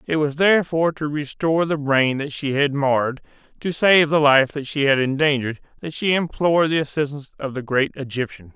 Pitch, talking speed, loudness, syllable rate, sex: 145 Hz, 195 wpm, -20 LUFS, 5.7 syllables/s, male